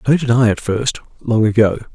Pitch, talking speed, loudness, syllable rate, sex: 115 Hz, 185 wpm, -16 LUFS, 5.6 syllables/s, male